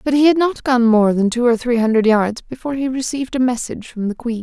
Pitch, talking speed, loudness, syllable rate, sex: 245 Hz, 270 wpm, -17 LUFS, 6.2 syllables/s, female